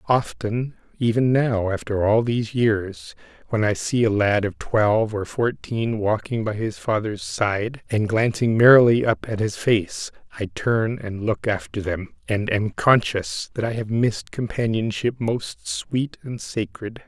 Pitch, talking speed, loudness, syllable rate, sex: 110 Hz, 160 wpm, -22 LUFS, 4.1 syllables/s, male